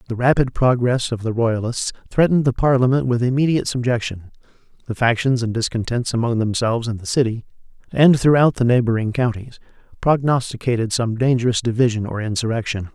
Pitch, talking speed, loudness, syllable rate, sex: 120 Hz, 150 wpm, -19 LUFS, 5.9 syllables/s, male